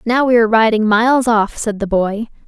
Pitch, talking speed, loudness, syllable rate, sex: 225 Hz, 220 wpm, -14 LUFS, 5.5 syllables/s, female